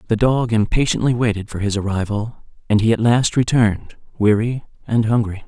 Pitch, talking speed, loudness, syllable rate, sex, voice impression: 110 Hz, 165 wpm, -18 LUFS, 5.4 syllables/s, male, very masculine, very adult-like, slightly middle-aged, thick, relaxed, slightly weak, slightly dark, soft, very muffled, fluent, slightly raspy, cool, very intellectual, slightly refreshing, sincere, calm, slightly mature, friendly, reassuring, slightly unique, elegant, slightly wild, slightly sweet, slightly lively, kind, very modest, slightly light